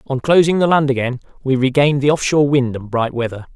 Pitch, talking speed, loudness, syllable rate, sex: 135 Hz, 235 wpm, -16 LUFS, 6.4 syllables/s, male